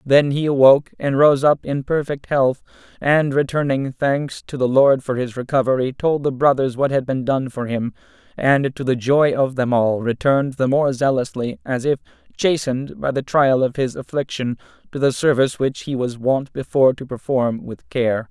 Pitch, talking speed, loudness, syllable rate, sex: 135 Hz, 195 wpm, -19 LUFS, 4.9 syllables/s, male